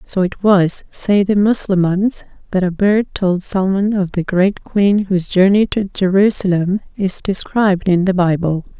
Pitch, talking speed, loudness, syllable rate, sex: 190 Hz, 165 wpm, -15 LUFS, 4.5 syllables/s, female